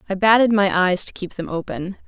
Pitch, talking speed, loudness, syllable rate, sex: 195 Hz, 230 wpm, -19 LUFS, 5.5 syllables/s, female